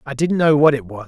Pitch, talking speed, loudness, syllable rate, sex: 140 Hz, 335 wpm, -16 LUFS, 6.3 syllables/s, male